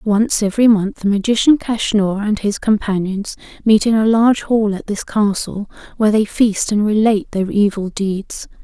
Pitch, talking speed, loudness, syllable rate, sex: 210 Hz, 175 wpm, -16 LUFS, 4.8 syllables/s, female